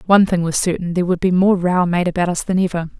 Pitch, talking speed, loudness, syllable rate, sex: 180 Hz, 280 wpm, -17 LUFS, 6.9 syllables/s, female